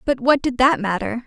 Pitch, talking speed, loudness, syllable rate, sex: 250 Hz, 235 wpm, -18 LUFS, 5.3 syllables/s, female